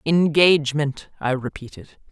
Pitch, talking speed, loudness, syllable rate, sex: 145 Hz, 85 wpm, -20 LUFS, 4.7 syllables/s, female